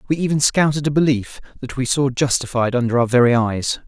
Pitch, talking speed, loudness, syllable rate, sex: 130 Hz, 200 wpm, -18 LUFS, 5.8 syllables/s, male